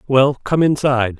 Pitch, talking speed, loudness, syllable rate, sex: 130 Hz, 150 wpm, -16 LUFS, 4.9 syllables/s, male